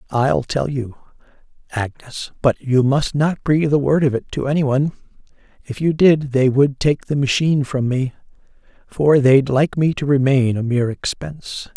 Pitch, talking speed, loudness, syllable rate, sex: 140 Hz, 180 wpm, -18 LUFS, 4.9 syllables/s, male